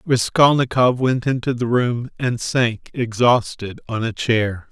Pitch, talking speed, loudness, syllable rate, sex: 120 Hz, 140 wpm, -19 LUFS, 3.8 syllables/s, male